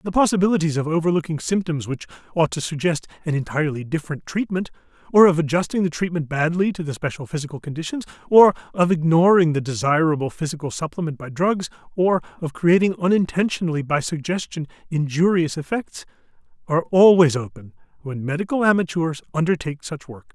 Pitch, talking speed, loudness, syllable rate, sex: 165 Hz, 145 wpm, -21 LUFS, 6.1 syllables/s, male